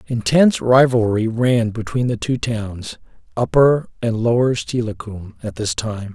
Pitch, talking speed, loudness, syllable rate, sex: 115 Hz, 135 wpm, -18 LUFS, 4.2 syllables/s, male